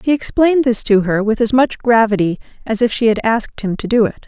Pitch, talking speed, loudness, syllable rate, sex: 230 Hz, 250 wpm, -15 LUFS, 5.9 syllables/s, female